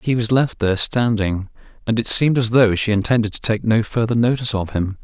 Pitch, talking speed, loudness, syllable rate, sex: 110 Hz, 225 wpm, -18 LUFS, 5.9 syllables/s, male